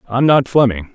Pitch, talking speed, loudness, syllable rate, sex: 120 Hz, 190 wpm, -14 LUFS, 4.9 syllables/s, male